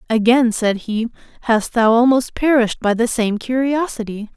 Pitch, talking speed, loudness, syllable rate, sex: 235 Hz, 150 wpm, -17 LUFS, 4.8 syllables/s, female